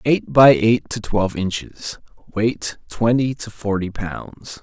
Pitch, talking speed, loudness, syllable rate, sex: 110 Hz, 145 wpm, -19 LUFS, 3.7 syllables/s, male